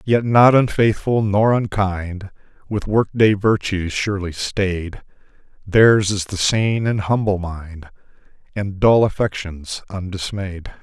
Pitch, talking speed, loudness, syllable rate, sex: 100 Hz, 120 wpm, -18 LUFS, 3.7 syllables/s, male